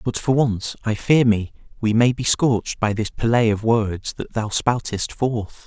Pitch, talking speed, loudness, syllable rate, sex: 110 Hz, 200 wpm, -20 LUFS, 4.2 syllables/s, male